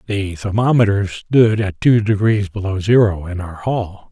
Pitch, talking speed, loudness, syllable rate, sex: 100 Hz, 160 wpm, -17 LUFS, 4.3 syllables/s, male